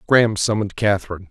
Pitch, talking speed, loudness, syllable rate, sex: 100 Hz, 140 wpm, -19 LUFS, 7.8 syllables/s, male